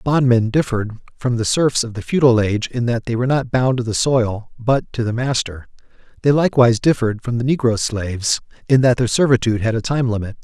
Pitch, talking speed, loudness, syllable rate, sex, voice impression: 120 Hz, 215 wpm, -18 LUFS, 6.0 syllables/s, male, very masculine, very adult-like, very middle-aged, very thick, slightly tensed, slightly weak, bright, soft, clear, fluent, slightly raspy, cool, very intellectual, slightly refreshing, very sincere, very calm, very mature, very friendly, very reassuring, unique, very elegant, slightly wild, sweet, lively, very kind, modest